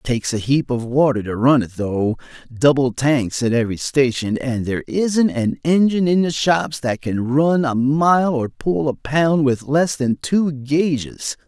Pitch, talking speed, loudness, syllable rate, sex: 135 Hz, 190 wpm, -18 LUFS, 4.2 syllables/s, male